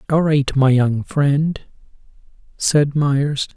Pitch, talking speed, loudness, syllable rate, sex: 140 Hz, 120 wpm, -17 LUFS, 2.9 syllables/s, male